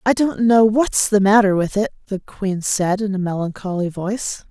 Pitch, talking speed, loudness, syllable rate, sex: 200 Hz, 200 wpm, -18 LUFS, 4.8 syllables/s, female